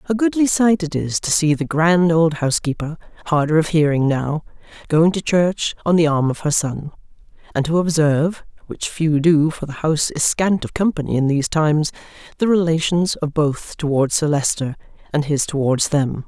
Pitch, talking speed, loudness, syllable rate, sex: 160 Hz, 180 wpm, -18 LUFS, 4.9 syllables/s, female